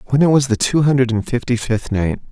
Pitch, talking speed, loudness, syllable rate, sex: 125 Hz, 260 wpm, -17 LUFS, 5.9 syllables/s, male